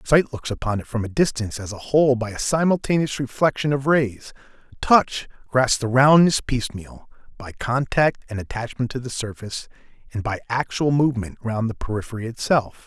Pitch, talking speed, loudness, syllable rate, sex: 125 Hz, 170 wpm, -22 LUFS, 5.4 syllables/s, male